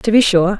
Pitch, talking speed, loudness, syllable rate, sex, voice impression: 200 Hz, 300 wpm, -13 LUFS, 5.5 syllables/s, female, feminine, adult-like, tensed, powerful, slightly bright, fluent, slightly raspy, intellectual, friendly, reassuring, elegant, lively, slightly kind